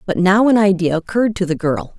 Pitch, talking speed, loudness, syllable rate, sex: 190 Hz, 240 wpm, -16 LUFS, 6.0 syllables/s, female